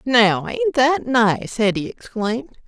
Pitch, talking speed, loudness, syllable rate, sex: 220 Hz, 135 wpm, -19 LUFS, 3.7 syllables/s, female